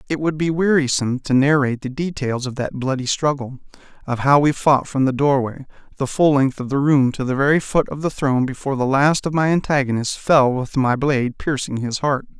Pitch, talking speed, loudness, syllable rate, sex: 140 Hz, 220 wpm, -19 LUFS, 5.7 syllables/s, male